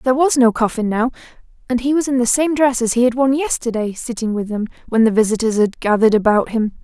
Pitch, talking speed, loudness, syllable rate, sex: 240 Hz, 235 wpm, -17 LUFS, 6.2 syllables/s, female